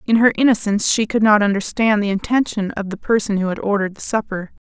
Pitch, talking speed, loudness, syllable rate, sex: 210 Hz, 215 wpm, -18 LUFS, 6.3 syllables/s, female